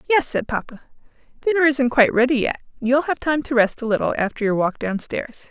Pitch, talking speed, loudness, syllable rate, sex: 255 Hz, 220 wpm, -20 LUFS, 5.7 syllables/s, female